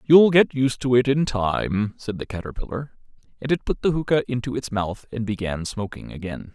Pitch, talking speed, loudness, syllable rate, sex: 120 Hz, 200 wpm, -23 LUFS, 5.2 syllables/s, male